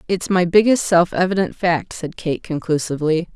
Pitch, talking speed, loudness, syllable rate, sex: 175 Hz, 160 wpm, -18 LUFS, 5.1 syllables/s, female